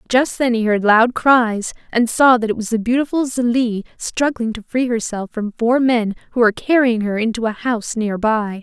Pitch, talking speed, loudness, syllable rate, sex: 230 Hz, 210 wpm, -17 LUFS, 4.9 syllables/s, female